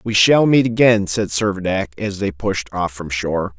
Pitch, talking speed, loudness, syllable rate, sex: 100 Hz, 200 wpm, -17 LUFS, 4.6 syllables/s, male